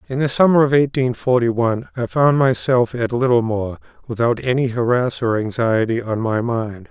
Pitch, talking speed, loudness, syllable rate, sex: 120 Hz, 175 wpm, -18 LUFS, 5.2 syllables/s, male